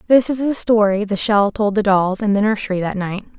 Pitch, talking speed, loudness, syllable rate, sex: 210 Hz, 250 wpm, -17 LUFS, 5.5 syllables/s, female